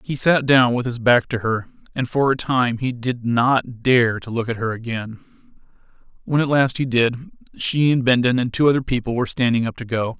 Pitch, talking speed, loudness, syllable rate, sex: 125 Hz, 225 wpm, -19 LUFS, 5.3 syllables/s, male